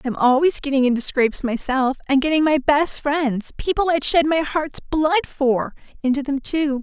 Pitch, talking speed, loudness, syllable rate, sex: 280 Hz, 165 wpm, -20 LUFS, 4.9 syllables/s, female